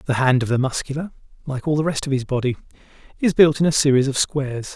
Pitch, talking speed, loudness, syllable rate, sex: 140 Hz, 240 wpm, -20 LUFS, 6.6 syllables/s, male